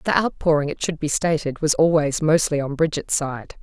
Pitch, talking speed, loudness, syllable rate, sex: 155 Hz, 200 wpm, -21 LUFS, 5.2 syllables/s, female